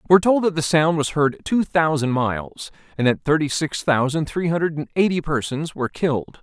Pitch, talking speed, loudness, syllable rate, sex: 150 Hz, 195 wpm, -20 LUFS, 5.3 syllables/s, male